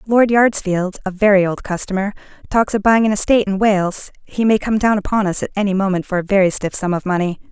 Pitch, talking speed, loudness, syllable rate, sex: 200 Hz, 215 wpm, -17 LUFS, 6.0 syllables/s, female